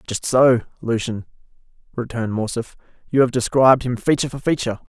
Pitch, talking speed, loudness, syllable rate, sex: 120 Hz, 145 wpm, -19 LUFS, 6.3 syllables/s, male